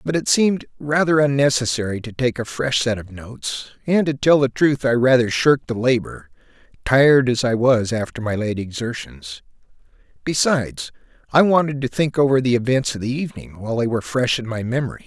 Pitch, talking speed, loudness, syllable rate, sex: 125 Hz, 190 wpm, -19 LUFS, 5.6 syllables/s, male